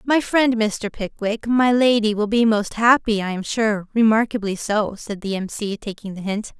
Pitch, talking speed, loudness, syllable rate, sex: 215 Hz, 200 wpm, -20 LUFS, 4.6 syllables/s, female